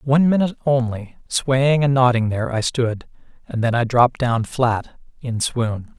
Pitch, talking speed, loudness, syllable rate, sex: 125 Hz, 170 wpm, -19 LUFS, 4.6 syllables/s, male